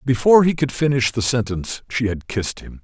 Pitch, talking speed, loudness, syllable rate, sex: 125 Hz, 210 wpm, -19 LUFS, 6.0 syllables/s, male